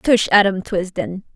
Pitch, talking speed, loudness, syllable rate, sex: 195 Hz, 135 wpm, -18 LUFS, 4.1 syllables/s, female